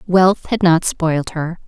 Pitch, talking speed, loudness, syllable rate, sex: 170 Hz, 180 wpm, -16 LUFS, 4.0 syllables/s, female